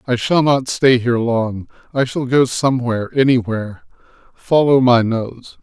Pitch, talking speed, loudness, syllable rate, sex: 125 Hz, 150 wpm, -16 LUFS, 4.6 syllables/s, male